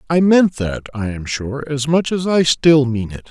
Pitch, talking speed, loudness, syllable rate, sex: 145 Hz, 235 wpm, -17 LUFS, 4.4 syllables/s, male